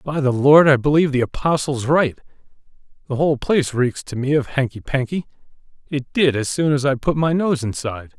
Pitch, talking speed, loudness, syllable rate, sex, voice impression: 140 Hz, 185 wpm, -19 LUFS, 5.9 syllables/s, male, masculine, adult-like, slightly thick, slightly cool, sincere, friendly